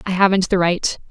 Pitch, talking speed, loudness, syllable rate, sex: 185 Hz, 215 wpm, -17 LUFS, 5.6 syllables/s, female